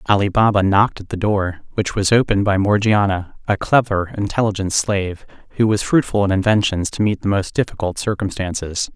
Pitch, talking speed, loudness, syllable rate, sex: 100 Hz, 175 wpm, -18 LUFS, 5.6 syllables/s, male